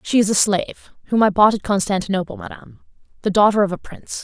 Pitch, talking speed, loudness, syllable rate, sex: 200 Hz, 210 wpm, -18 LUFS, 6.7 syllables/s, female